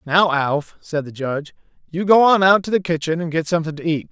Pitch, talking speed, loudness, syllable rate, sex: 165 Hz, 250 wpm, -18 LUFS, 5.9 syllables/s, male